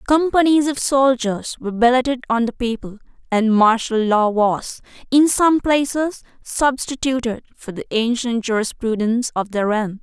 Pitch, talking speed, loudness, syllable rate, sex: 240 Hz, 140 wpm, -18 LUFS, 4.6 syllables/s, female